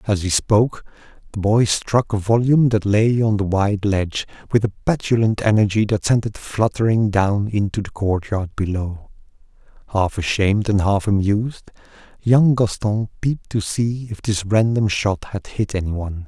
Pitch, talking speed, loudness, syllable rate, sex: 105 Hz, 170 wpm, -19 LUFS, 4.9 syllables/s, male